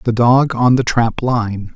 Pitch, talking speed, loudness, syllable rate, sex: 120 Hz, 205 wpm, -15 LUFS, 3.7 syllables/s, male